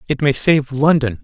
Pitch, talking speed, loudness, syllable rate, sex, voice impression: 135 Hz, 145 wpm, -16 LUFS, 4.8 syllables/s, male, masculine, adult-like, relaxed, slightly powerful, slightly muffled, intellectual, sincere, friendly, lively, slightly strict